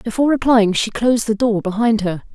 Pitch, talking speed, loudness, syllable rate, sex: 225 Hz, 205 wpm, -17 LUFS, 5.8 syllables/s, female